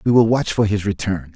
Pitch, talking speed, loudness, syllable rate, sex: 100 Hz, 265 wpm, -18 LUFS, 5.6 syllables/s, male